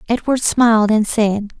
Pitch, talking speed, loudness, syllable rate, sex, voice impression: 220 Hz, 150 wpm, -15 LUFS, 4.4 syllables/s, female, feminine, adult-like, relaxed, bright, soft, raspy, intellectual, friendly, reassuring, elegant, kind, modest